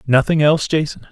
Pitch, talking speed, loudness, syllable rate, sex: 150 Hz, 160 wpm, -16 LUFS, 6.3 syllables/s, male